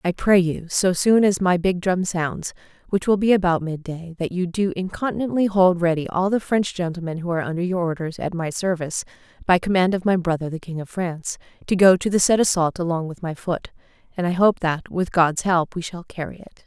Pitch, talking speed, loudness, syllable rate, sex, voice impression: 180 Hz, 225 wpm, -21 LUFS, 5.6 syllables/s, female, very feminine, adult-like, thin, tensed, slightly powerful, bright, soft, clear, fluent, slightly raspy, cute, very intellectual, very refreshing, sincere, calm, very friendly, very reassuring, unique, elegant, slightly wild, sweet, slightly lively, kind